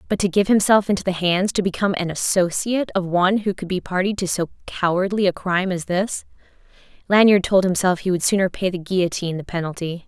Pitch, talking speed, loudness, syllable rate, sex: 185 Hz, 210 wpm, -20 LUFS, 6.2 syllables/s, female